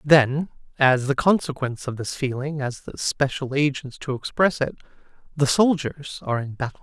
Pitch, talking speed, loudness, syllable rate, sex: 140 Hz, 165 wpm, -23 LUFS, 5.1 syllables/s, male